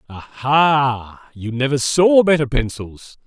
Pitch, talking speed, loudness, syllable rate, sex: 130 Hz, 110 wpm, -16 LUFS, 3.3 syllables/s, male